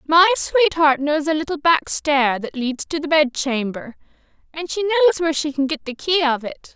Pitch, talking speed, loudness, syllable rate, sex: 300 Hz, 205 wpm, -19 LUFS, 4.7 syllables/s, female